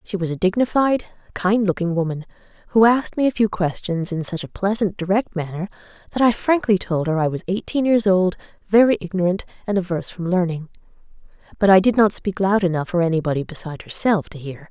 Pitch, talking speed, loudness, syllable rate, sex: 190 Hz, 195 wpm, -20 LUFS, 6.0 syllables/s, female